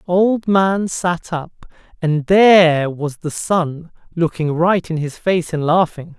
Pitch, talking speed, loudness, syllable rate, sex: 170 Hz, 155 wpm, -17 LUFS, 3.5 syllables/s, male